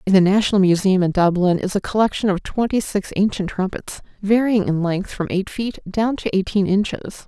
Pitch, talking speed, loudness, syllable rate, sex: 195 Hz, 200 wpm, -19 LUFS, 5.5 syllables/s, female